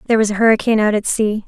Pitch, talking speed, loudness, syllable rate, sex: 215 Hz, 285 wpm, -15 LUFS, 8.5 syllables/s, female